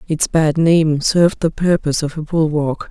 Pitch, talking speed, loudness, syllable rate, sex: 160 Hz, 185 wpm, -16 LUFS, 4.8 syllables/s, female